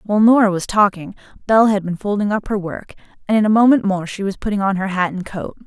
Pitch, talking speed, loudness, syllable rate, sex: 200 Hz, 255 wpm, -17 LUFS, 6.4 syllables/s, female